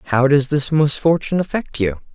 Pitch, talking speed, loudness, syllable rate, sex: 145 Hz, 170 wpm, -18 LUFS, 5.0 syllables/s, male